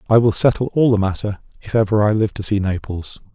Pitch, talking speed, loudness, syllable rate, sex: 105 Hz, 235 wpm, -18 LUFS, 6.0 syllables/s, male